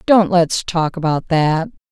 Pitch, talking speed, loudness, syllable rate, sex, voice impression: 170 Hz, 155 wpm, -16 LUFS, 3.7 syllables/s, female, feminine, middle-aged, tensed, powerful, slightly hard, slightly muffled, intellectual, calm, elegant, lively, slightly strict, slightly sharp